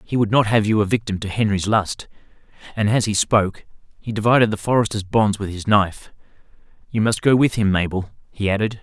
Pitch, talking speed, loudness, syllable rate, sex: 105 Hz, 205 wpm, -19 LUFS, 5.9 syllables/s, male